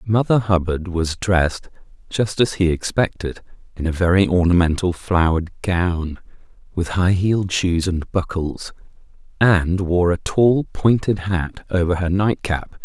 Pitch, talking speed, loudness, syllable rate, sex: 90 Hz, 135 wpm, -19 LUFS, 4.2 syllables/s, male